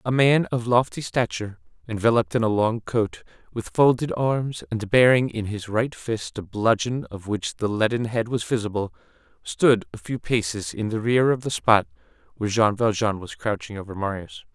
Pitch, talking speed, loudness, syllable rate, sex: 115 Hz, 185 wpm, -23 LUFS, 5.0 syllables/s, male